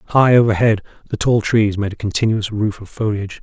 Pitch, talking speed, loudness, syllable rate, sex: 105 Hz, 195 wpm, -17 LUFS, 5.5 syllables/s, male